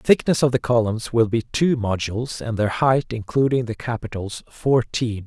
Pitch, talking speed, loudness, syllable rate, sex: 115 Hz, 180 wpm, -21 LUFS, 4.9 syllables/s, male